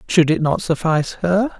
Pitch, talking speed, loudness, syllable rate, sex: 170 Hz, 190 wpm, -18 LUFS, 5.1 syllables/s, male